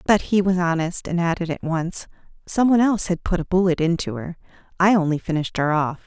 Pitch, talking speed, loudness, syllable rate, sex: 175 Hz, 220 wpm, -21 LUFS, 6.1 syllables/s, female